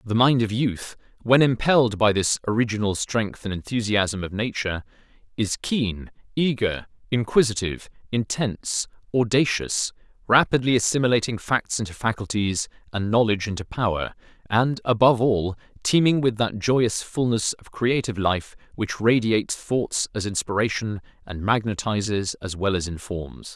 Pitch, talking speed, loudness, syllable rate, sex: 110 Hz, 130 wpm, -23 LUFS, 4.9 syllables/s, male